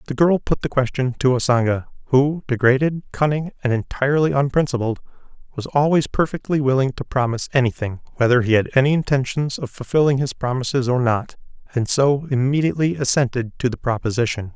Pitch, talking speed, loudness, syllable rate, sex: 130 Hz, 155 wpm, -20 LUFS, 5.9 syllables/s, male